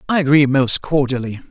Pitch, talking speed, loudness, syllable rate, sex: 135 Hz, 160 wpm, -16 LUFS, 5.6 syllables/s, male